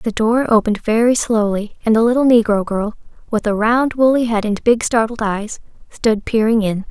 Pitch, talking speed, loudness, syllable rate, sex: 225 Hz, 190 wpm, -16 LUFS, 5.0 syllables/s, female